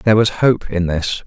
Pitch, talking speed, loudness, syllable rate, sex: 100 Hz, 235 wpm, -16 LUFS, 5.0 syllables/s, male